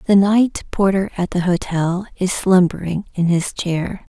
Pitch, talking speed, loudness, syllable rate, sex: 185 Hz, 160 wpm, -18 LUFS, 4.1 syllables/s, female